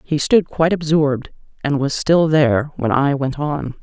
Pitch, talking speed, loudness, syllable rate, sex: 145 Hz, 190 wpm, -17 LUFS, 4.8 syllables/s, female